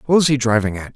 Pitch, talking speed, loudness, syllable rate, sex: 125 Hz, 315 wpm, -17 LUFS, 7.4 syllables/s, male